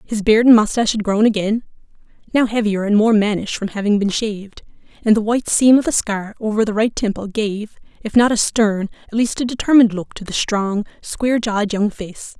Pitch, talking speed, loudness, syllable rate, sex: 215 Hz, 215 wpm, -17 LUFS, 4.7 syllables/s, female